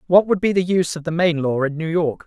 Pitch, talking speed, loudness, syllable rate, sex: 165 Hz, 320 wpm, -19 LUFS, 6.6 syllables/s, male